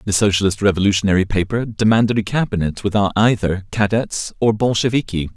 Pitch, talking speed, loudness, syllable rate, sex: 105 Hz, 135 wpm, -18 LUFS, 6.0 syllables/s, male